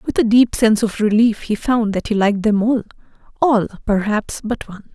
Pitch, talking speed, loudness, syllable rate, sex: 220 Hz, 205 wpm, -17 LUFS, 5.4 syllables/s, female